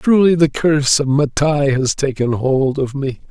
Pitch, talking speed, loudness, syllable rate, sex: 140 Hz, 180 wpm, -16 LUFS, 4.4 syllables/s, male